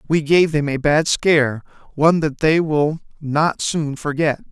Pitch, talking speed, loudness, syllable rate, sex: 150 Hz, 160 wpm, -18 LUFS, 4.3 syllables/s, male